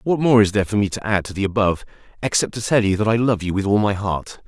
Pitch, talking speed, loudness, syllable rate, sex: 105 Hz, 310 wpm, -19 LUFS, 6.8 syllables/s, male